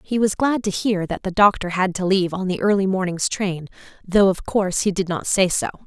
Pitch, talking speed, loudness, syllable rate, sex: 195 Hz, 245 wpm, -20 LUFS, 5.5 syllables/s, female